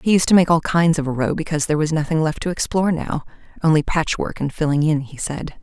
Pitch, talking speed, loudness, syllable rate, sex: 155 Hz, 255 wpm, -19 LUFS, 6.4 syllables/s, female